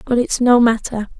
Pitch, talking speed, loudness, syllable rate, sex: 235 Hz, 200 wpm, -15 LUFS, 4.9 syllables/s, female